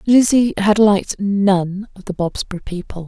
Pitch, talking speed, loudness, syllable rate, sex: 195 Hz, 155 wpm, -17 LUFS, 4.7 syllables/s, female